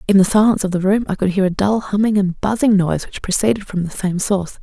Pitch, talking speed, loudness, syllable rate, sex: 195 Hz, 270 wpm, -17 LUFS, 6.5 syllables/s, female